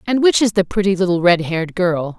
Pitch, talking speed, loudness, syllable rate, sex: 185 Hz, 245 wpm, -16 LUFS, 5.9 syllables/s, female